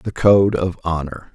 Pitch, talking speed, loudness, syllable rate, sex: 90 Hz, 180 wpm, -17 LUFS, 4.0 syllables/s, male